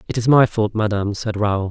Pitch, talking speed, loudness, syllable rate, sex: 110 Hz, 245 wpm, -18 LUFS, 5.9 syllables/s, male